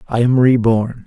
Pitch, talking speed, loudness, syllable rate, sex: 120 Hz, 170 wpm, -14 LUFS, 4.6 syllables/s, male